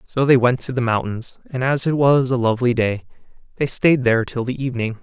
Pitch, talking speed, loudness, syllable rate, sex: 125 Hz, 225 wpm, -19 LUFS, 5.9 syllables/s, male